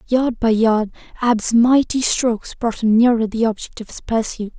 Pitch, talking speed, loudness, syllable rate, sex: 230 Hz, 185 wpm, -17 LUFS, 4.7 syllables/s, female